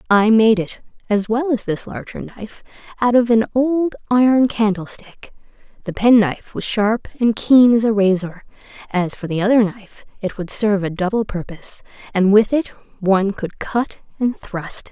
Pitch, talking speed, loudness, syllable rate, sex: 215 Hz, 175 wpm, -18 LUFS, 4.9 syllables/s, female